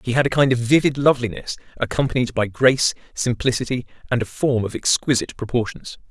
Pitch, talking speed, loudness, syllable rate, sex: 125 Hz, 165 wpm, -20 LUFS, 6.3 syllables/s, male